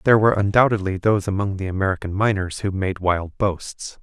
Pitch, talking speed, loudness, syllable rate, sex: 100 Hz, 180 wpm, -21 LUFS, 5.9 syllables/s, male